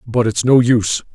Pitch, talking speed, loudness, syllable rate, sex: 115 Hz, 210 wpm, -15 LUFS, 5.5 syllables/s, male